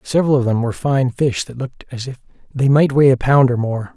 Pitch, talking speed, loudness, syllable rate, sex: 130 Hz, 260 wpm, -16 LUFS, 6.0 syllables/s, male